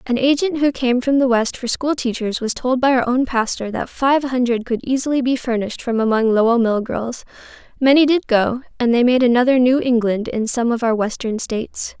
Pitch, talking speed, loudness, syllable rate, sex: 245 Hz, 215 wpm, -18 LUFS, 5.3 syllables/s, female